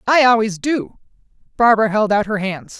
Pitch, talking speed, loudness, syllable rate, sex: 215 Hz, 170 wpm, -16 LUFS, 5.3 syllables/s, female